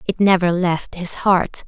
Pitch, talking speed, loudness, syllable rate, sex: 180 Hz, 180 wpm, -18 LUFS, 4.0 syllables/s, female